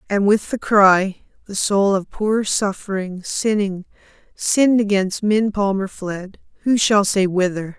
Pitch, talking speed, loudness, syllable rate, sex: 200 Hz, 140 wpm, -18 LUFS, 3.9 syllables/s, female